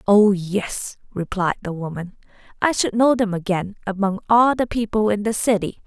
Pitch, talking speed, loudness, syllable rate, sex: 205 Hz, 175 wpm, -20 LUFS, 4.8 syllables/s, female